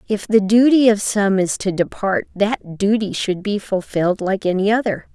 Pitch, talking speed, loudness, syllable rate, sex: 205 Hz, 185 wpm, -18 LUFS, 4.8 syllables/s, female